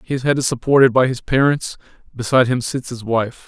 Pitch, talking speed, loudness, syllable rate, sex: 125 Hz, 205 wpm, -17 LUFS, 5.7 syllables/s, male